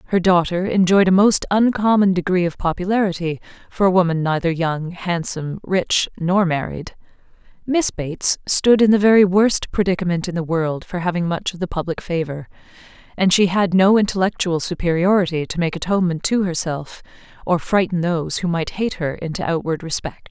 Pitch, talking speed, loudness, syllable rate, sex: 180 Hz, 170 wpm, -19 LUFS, 5.3 syllables/s, female